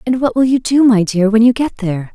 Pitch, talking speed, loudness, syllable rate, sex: 230 Hz, 305 wpm, -13 LUFS, 5.9 syllables/s, female